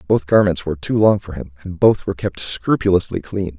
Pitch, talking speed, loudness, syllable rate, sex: 95 Hz, 220 wpm, -18 LUFS, 5.8 syllables/s, male